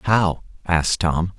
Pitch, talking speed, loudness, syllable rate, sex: 90 Hz, 130 wpm, -20 LUFS, 3.6 syllables/s, male